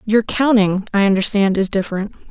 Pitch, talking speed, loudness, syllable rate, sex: 205 Hz, 155 wpm, -16 LUFS, 5.5 syllables/s, female